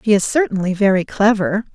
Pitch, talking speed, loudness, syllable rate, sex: 205 Hz, 170 wpm, -16 LUFS, 5.7 syllables/s, female